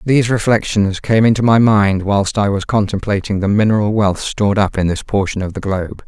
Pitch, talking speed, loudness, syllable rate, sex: 105 Hz, 205 wpm, -15 LUFS, 5.6 syllables/s, male